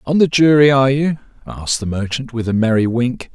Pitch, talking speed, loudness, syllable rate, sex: 130 Hz, 215 wpm, -15 LUFS, 5.8 syllables/s, male